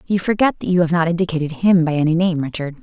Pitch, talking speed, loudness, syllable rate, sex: 170 Hz, 255 wpm, -18 LUFS, 6.4 syllables/s, female